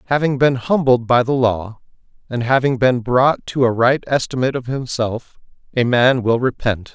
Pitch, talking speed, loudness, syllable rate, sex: 125 Hz, 175 wpm, -17 LUFS, 4.7 syllables/s, male